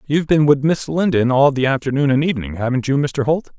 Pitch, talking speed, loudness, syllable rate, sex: 140 Hz, 235 wpm, -17 LUFS, 6.1 syllables/s, male